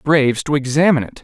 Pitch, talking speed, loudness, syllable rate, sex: 140 Hz, 195 wpm, -16 LUFS, 7.2 syllables/s, male